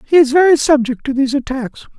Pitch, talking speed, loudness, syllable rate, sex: 275 Hz, 210 wpm, -14 LUFS, 6.7 syllables/s, male